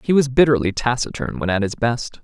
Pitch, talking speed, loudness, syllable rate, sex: 125 Hz, 215 wpm, -19 LUFS, 5.6 syllables/s, male